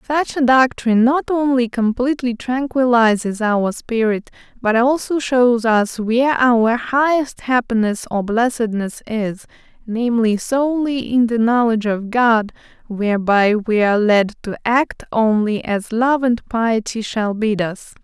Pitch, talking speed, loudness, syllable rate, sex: 235 Hz, 135 wpm, -17 LUFS, 4.2 syllables/s, female